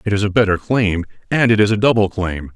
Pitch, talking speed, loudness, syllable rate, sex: 105 Hz, 260 wpm, -16 LUFS, 6.1 syllables/s, male